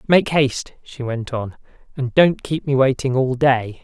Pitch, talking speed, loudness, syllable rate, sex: 130 Hz, 190 wpm, -19 LUFS, 4.4 syllables/s, male